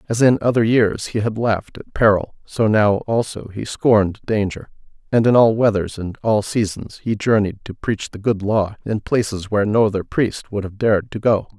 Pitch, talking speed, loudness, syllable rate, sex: 105 Hz, 205 wpm, -19 LUFS, 5.0 syllables/s, male